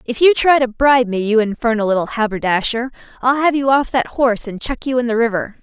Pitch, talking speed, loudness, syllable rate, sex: 240 Hz, 235 wpm, -16 LUFS, 6.1 syllables/s, female